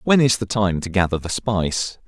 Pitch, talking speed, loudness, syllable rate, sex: 100 Hz, 230 wpm, -20 LUFS, 5.2 syllables/s, male